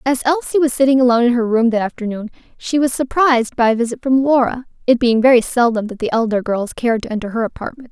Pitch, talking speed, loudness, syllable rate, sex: 245 Hz, 235 wpm, -16 LUFS, 6.5 syllables/s, female